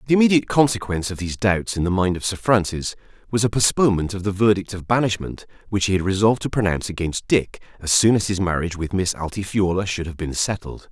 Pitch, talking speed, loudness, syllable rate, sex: 100 Hz, 220 wpm, -21 LUFS, 6.5 syllables/s, male